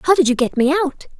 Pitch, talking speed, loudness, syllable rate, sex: 300 Hz, 300 wpm, -17 LUFS, 6.4 syllables/s, female